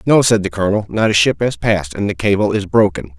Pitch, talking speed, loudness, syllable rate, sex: 100 Hz, 265 wpm, -15 LUFS, 6.5 syllables/s, male